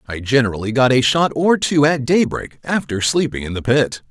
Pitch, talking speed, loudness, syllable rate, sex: 135 Hz, 205 wpm, -17 LUFS, 5.2 syllables/s, male